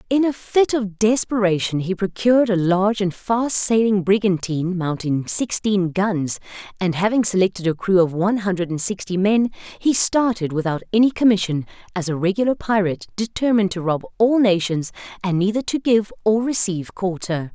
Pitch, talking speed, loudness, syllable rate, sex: 200 Hz, 165 wpm, -20 LUFS, 5.3 syllables/s, female